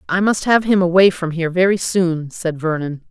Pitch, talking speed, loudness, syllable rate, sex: 175 Hz, 215 wpm, -17 LUFS, 5.1 syllables/s, female